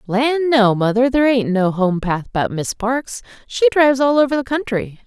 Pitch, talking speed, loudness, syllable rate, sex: 240 Hz, 180 wpm, -17 LUFS, 5.2 syllables/s, female